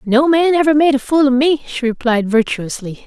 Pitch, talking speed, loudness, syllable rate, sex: 265 Hz, 215 wpm, -14 LUFS, 5.1 syllables/s, female